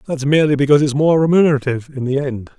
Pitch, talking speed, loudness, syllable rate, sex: 140 Hz, 210 wpm, -15 LUFS, 7.9 syllables/s, male